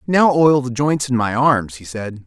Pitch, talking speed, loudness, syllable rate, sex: 130 Hz, 240 wpm, -16 LUFS, 4.2 syllables/s, male